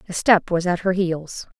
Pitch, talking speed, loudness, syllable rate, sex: 180 Hz, 225 wpm, -20 LUFS, 4.6 syllables/s, female